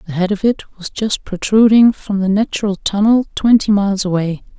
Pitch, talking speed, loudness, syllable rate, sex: 205 Hz, 185 wpm, -15 LUFS, 5.2 syllables/s, female